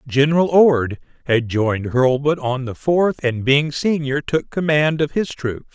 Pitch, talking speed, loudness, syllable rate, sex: 140 Hz, 165 wpm, -18 LUFS, 4.2 syllables/s, male